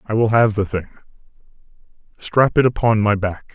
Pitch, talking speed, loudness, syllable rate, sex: 105 Hz, 170 wpm, -18 LUFS, 5.1 syllables/s, male